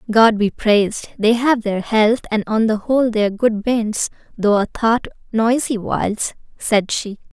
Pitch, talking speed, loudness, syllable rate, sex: 220 Hz, 180 wpm, -18 LUFS, 4.6 syllables/s, female